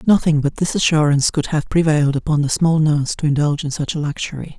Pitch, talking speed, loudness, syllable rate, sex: 150 Hz, 220 wpm, -18 LUFS, 6.5 syllables/s, male